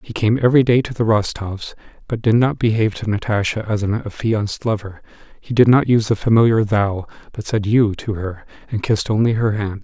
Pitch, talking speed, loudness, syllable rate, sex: 110 Hz, 205 wpm, -18 LUFS, 5.6 syllables/s, male